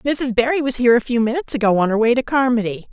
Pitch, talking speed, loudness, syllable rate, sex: 240 Hz, 265 wpm, -17 LUFS, 7.1 syllables/s, female